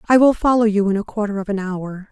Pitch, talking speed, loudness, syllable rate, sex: 210 Hz, 285 wpm, -18 LUFS, 6.0 syllables/s, female